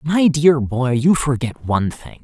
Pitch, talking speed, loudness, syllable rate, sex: 135 Hz, 190 wpm, -17 LUFS, 4.2 syllables/s, male